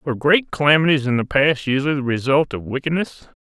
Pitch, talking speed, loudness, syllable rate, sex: 140 Hz, 190 wpm, -18 LUFS, 6.1 syllables/s, male